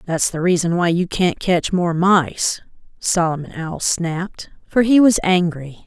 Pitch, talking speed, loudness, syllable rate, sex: 175 Hz, 165 wpm, -18 LUFS, 4.1 syllables/s, female